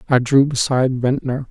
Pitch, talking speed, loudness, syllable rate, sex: 130 Hz, 160 wpm, -17 LUFS, 5.3 syllables/s, male